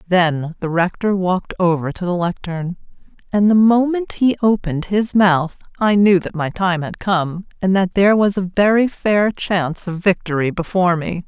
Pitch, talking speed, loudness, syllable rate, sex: 185 Hz, 180 wpm, -17 LUFS, 4.8 syllables/s, female